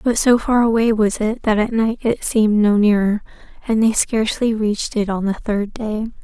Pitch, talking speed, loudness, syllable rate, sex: 220 Hz, 210 wpm, -18 LUFS, 5.1 syllables/s, female